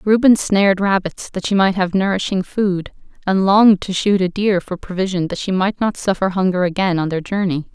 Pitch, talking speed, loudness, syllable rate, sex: 190 Hz, 210 wpm, -17 LUFS, 5.3 syllables/s, female